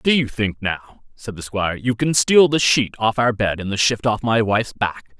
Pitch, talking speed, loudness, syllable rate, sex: 110 Hz, 255 wpm, -19 LUFS, 4.8 syllables/s, male